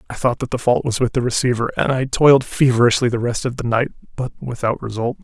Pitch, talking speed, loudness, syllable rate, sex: 120 Hz, 240 wpm, -18 LUFS, 6.4 syllables/s, male